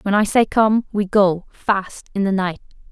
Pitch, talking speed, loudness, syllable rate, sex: 200 Hz, 165 wpm, -19 LUFS, 4.2 syllables/s, female